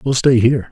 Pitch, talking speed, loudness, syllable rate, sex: 125 Hz, 250 wpm, -14 LUFS, 6.6 syllables/s, male